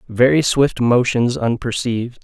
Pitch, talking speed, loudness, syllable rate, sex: 120 Hz, 105 wpm, -17 LUFS, 4.4 syllables/s, male